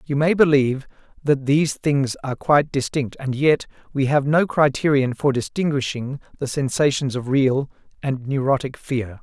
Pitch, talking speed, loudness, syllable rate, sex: 140 Hz, 155 wpm, -21 LUFS, 4.9 syllables/s, male